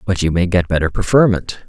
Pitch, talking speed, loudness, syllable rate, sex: 95 Hz, 215 wpm, -16 LUFS, 6.0 syllables/s, male